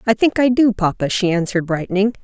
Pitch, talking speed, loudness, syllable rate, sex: 205 Hz, 215 wpm, -17 LUFS, 6.3 syllables/s, female